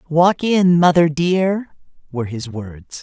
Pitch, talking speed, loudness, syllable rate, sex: 160 Hz, 140 wpm, -17 LUFS, 3.6 syllables/s, male